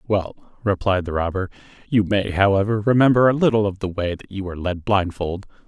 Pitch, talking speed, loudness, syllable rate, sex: 100 Hz, 190 wpm, -20 LUFS, 5.5 syllables/s, male